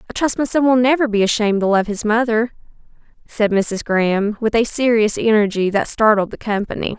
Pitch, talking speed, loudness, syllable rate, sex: 220 Hz, 200 wpm, -17 LUFS, 5.7 syllables/s, female